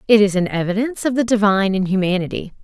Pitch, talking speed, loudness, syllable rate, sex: 205 Hz, 205 wpm, -18 LUFS, 7.1 syllables/s, female